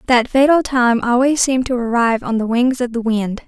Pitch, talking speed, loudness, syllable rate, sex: 245 Hz, 225 wpm, -16 LUFS, 5.6 syllables/s, female